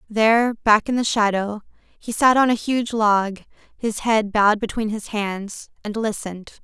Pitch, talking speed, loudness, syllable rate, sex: 215 Hz, 170 wpm, -20 LUFS, 4.4 syllables/s, female